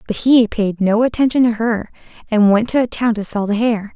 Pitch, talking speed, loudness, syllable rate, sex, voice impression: 225 Hz, 245 wpm, -16 LUFS, 5.3 syllables/s, female, very feminine, young, thin, tensed, slightly powerful, bright, soft, clear, fluent, slightly raspy, very cute, intellectual, very refreshing, sincere, slightly calm, very friendly, very reassuring, very unique, elegant, wild, very sweet, very lively, very kind, slightly intense, very light